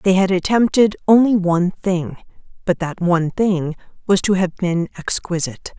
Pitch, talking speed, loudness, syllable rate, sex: 185 Hz, 155 wpm, -18 LUFS, 4.9 syllables/s, female